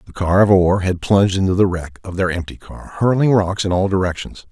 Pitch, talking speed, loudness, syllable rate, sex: 95 Hz, 240 wpm, -17 LUFS, 5.8 syllables/s, male